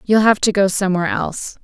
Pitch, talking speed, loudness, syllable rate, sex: 195 Hz, 220 wpm, -17 LUFS, 6.6 syllables/s, female